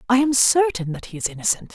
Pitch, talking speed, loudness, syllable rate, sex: 230 Hz, 240 wpm, -20 LUFS, 6.4 syllables/s, female